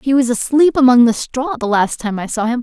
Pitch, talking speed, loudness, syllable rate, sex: 245 Hz, 275 wpm, -14 LUFS, 5.7 syllables/s, female